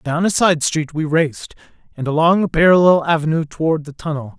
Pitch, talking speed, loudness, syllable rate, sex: 160 Hz, 190 wpm, -16 LUFS, 5.5 syllables/s, male